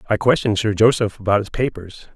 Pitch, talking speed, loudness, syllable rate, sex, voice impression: 110 Hz, 195 wpm, -18 LUFS, 6.3 syllables/s, male, very masculine, middle-aged, slightly thin, cool, slightly intellectual, calm, slightly elegant